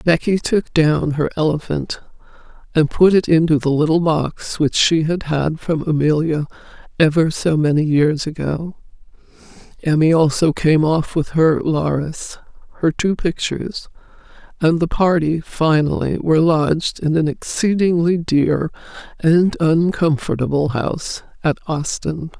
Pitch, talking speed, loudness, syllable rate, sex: 160 Hz, 125 wpm, -17 LUFS, 4.3 syllables/s, female